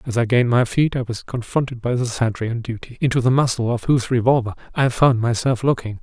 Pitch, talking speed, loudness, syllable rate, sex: 120 Hz, 230 wpm, -20 LUFS, 6.2 syllables/s, male